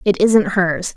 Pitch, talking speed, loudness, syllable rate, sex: 190 Hz, 190 wpm, -16 LUFS, 3.5 syllables/s, female